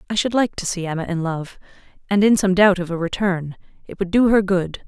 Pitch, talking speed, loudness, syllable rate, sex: 190 Hz, 245 wpm, -19 LUFS, 5.7 syllables/s, female